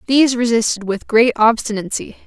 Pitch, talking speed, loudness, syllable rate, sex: 230 Hz, 130 wpm, -16 LUFS, 5.5 syllables/s, female